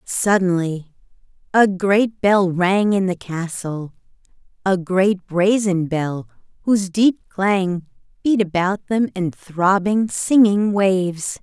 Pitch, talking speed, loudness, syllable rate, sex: 190 Hz, 115 wpm, -19 LUFS, 3.4 syllables/s, female